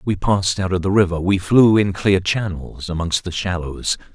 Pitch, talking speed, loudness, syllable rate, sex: 95 Hz, 205 wpm, -18 LUFS, 4.9 syllables/s, male